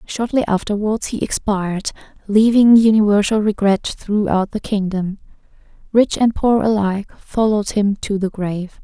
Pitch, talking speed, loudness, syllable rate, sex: 210 Hz, 130 wpm, -17 LUFS, 4.7 syllables/s, female